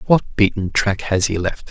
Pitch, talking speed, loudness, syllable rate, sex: 105 Hz, 210 wpm, -18 LUFS, 4.5 syllables/s, male